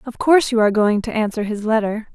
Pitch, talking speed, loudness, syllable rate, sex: 220 Hz, 250 wpm, -18 LUFS, 6.6 syllables/s, female